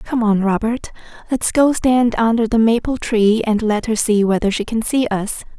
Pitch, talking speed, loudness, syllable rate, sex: 225 Hz, 205 wpm, -17 LUFS, 4.6 syllables/s, female